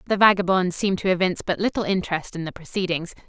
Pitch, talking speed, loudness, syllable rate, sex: 185 Hz, 200 wpm, -22 LUFS, 7.2 syllables/s, female